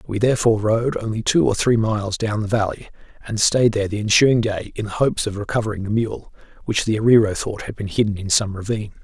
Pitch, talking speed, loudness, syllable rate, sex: 110 Hz, 220 wpm, -20 LUFS, 6.2 syllables/s, male